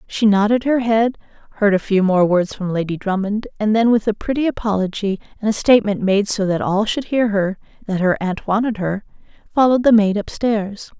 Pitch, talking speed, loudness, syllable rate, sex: 210 Hz, 205 wpm, -18 LUFS, 5.4 syllables/s, female